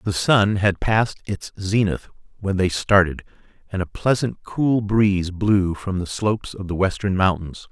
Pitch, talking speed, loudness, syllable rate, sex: 100 Hz, 170 wpm, -21 LUFS, 4.5 syllables/s, male